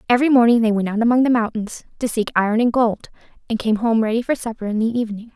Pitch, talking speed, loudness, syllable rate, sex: 230 Hz, 245 wpm, -19 LUFS, 7.0 syllables/s, female